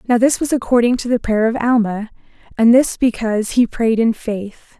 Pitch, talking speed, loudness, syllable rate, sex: 235 Hz, 200 wpm, -16 LUFS, 5.3 syllables/s, female